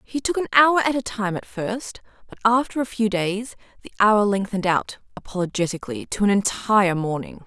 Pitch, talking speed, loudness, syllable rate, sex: 210 Hz, 185 wpm, -22 LUFS, 4.8 syllables/s, female